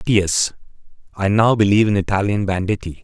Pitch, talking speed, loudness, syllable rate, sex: 100 Hz, 140 wpm, -18 LUFS, 5.9 syllables/s, male